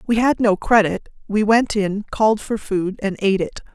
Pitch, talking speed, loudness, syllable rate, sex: 210 Hz, 210 wpm, -19 LUFS, 5.1 syllables/s, female